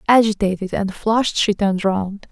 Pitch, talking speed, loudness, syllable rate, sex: 205 Hz, 155 wpm, -19 LUFS, 5.1 syllables/s, female